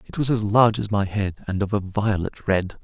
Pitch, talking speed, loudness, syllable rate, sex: 105 Hz, 255 wpm, -22 LUFS, 5.5 syllables/s, male